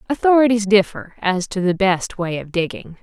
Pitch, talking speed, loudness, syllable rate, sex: 195 Hz, 180 wpm, -18 LUFS, 5.0 syllables/s, female